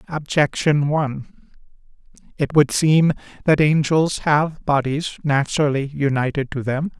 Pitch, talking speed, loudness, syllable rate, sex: 145 Hz, 110 wpm, -19 LUFS, 4.4 syllables/s, male